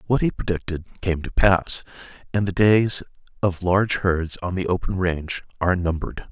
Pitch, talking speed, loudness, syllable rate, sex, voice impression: 90 Hz, 170 wpm, -22 LUFS, 5.1 syllables/s, male, very masculine, middle-aged, thick, sincere, calm